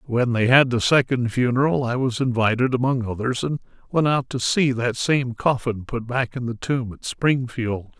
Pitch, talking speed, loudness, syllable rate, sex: 125 Hz, 195 wpm, -21 LUFS, 4.7 syllables/s, male